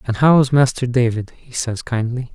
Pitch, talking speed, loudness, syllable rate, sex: 125 Hz, 205 wpm, -18 LUFS, 5.1 syllables/s, male